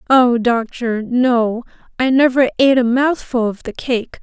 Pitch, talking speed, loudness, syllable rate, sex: 245 Hz, 155 wpm, -16 LUFS, 4.2 syllables/s, female